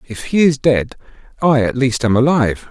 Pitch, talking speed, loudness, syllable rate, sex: 125 Hz, 200 wpm, -15 LUFS, 5.2 syllables/s, male